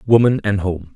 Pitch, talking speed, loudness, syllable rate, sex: 100 Hz, 190 wpm, -17 LUFS, 5.1 syllables/s, male